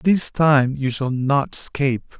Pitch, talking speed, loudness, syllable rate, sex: 140 Hz, 165 wpm, -20 LUFS, 3.7 syllables/s, male